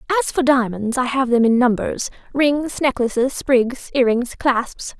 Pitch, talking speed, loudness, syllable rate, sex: 255 Hz, 170 wpm, -18 LUFS, 4.3 syllables/s, female